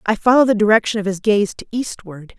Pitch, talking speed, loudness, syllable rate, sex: 210 Hz, 225 wpm, -17 LUFS, 5.8 syllables/s, female